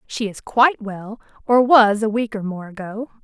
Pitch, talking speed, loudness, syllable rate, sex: 220 Hz, 205 wpm, -18 LUFS, 4.7 syllables/s, female